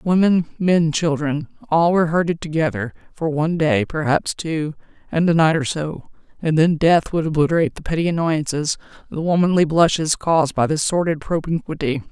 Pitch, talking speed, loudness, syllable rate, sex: 160 Hz, 160 wpm, -19 LUFS, 5.3 syllables/s, female